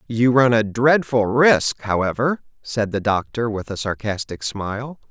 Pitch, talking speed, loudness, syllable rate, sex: 115 Hz, 155 wpm, -20 LUFS, 4.3 syllables/s, male